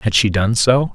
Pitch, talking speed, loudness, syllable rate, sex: 115 Hz, 255 wpm, -15 LUFS, 4.5 syllables/s, male